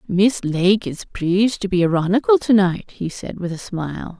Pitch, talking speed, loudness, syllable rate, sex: 190 Hz, 200 wpm, -19 LUFS, 4.8 syllables/s, female